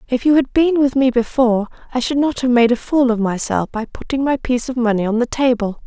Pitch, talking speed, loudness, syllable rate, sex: 245 Hz, 255 wpm, -17 LUFS, 5.9 syllables/s, female